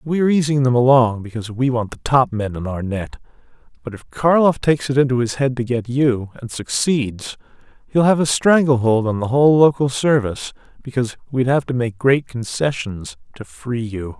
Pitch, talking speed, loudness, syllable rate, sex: 125 Hz, 195 wpm, -18 LUFS, 5.3 syllables/s, male